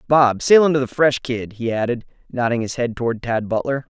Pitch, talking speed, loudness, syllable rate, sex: 125 Hz, 215 wpm, -19 LUFS, 5.4 syllables/s, male